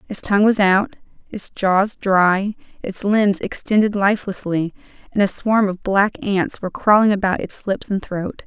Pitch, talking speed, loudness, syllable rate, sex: 200 Hz, 170 wpm, -18 LUFS, 4.5 syllables/s, female